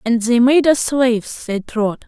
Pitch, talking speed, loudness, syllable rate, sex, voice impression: 240 Hz, 200 wpm, -16 LUFS, 4.1 syllables/s, female, very feminine, slightly adult-like, very thin, tensed, powerful, bright, slightly hard, very clear, very fluent, slightly cool, intellectual, very refreshing, sincere, slightly calm, friendly, slightly reassuring, very unique, elegant, wild, sweet, very lively, strict, intense, slightly sharp